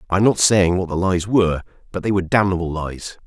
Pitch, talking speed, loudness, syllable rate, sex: 90 Hz, 240 wpm, -19 LUFS, 6.2 syllables/s, male